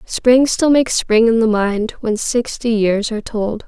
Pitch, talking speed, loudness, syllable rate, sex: 225 Hz, 195 wpm, -16 LUFS, 4.3 syllables/s, female